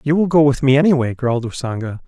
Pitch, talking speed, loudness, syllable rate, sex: 135 Hz, 230 wpm, -16 LUFS, 6.6 syllables/s, male